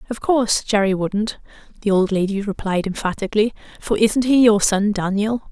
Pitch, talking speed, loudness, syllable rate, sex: 215 Hz, 165 wpm, -19 LUFS, 5.3 syllables/s, female